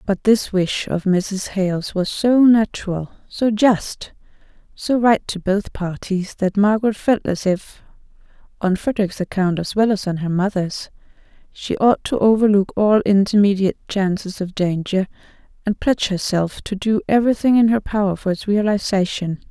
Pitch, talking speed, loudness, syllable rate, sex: 200 Hz, 155 wpm, -19 LUFS, 4.8 syllables/s, female